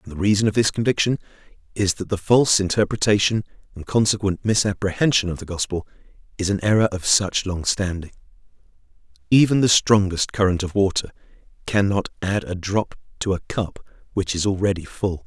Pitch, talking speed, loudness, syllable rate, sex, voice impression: 100 Hz, 160 wpm, -21 LUFS, 5.7 syllables/s, male, masculine, slightly middle-aged, slightly powerful, clear, fluent, raspy, cool, slightly mature, reassuring, elegant, wild, kind, slightly strict